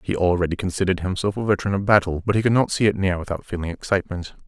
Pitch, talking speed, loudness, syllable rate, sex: 95 Hz, 240 wpm, -22 LUFS, 7.5 syllables/s, male